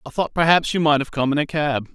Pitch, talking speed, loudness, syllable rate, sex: 150 Hz, 310 wpm, -19 LUFS, 6.2 syllables/s, male